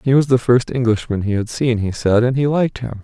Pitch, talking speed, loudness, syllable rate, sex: 120 Hz, 275 wpm, -17 LUFS, 5.9 syllables/s, male